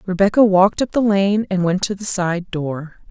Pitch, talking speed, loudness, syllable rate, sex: 190 Hz, 210 wpm, -17 LUFS, 5.0 syllables/s, female